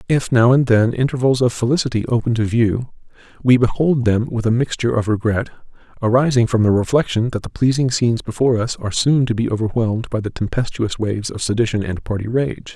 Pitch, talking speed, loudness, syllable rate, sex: 115 Hz, 200 wpm, -18 LUFS, 6.1 syllables/s, male